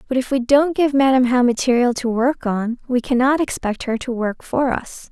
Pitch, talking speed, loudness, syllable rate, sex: 250 Hz, 225 wpm, -18 LUFS, 4.9 syllables/s, female